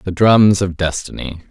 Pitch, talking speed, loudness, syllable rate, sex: 95 Hz, 160 wpm, -14 LUFS, 4.4 syllables/s, male